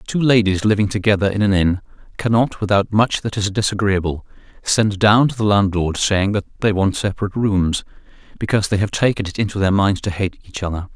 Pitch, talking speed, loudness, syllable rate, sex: 100 Hz, 195 wpm, -18 LUFS, 5.8 syllables/s, male